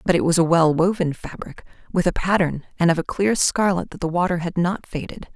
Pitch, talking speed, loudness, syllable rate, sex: 175 Hz, 235 wpm, -21 LUFS, 5.6 syllables/s, female